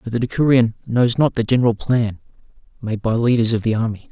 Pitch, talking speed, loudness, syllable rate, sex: 115 Hz, 205 wpm, -18 LUFS, 6.0 syllables/s, male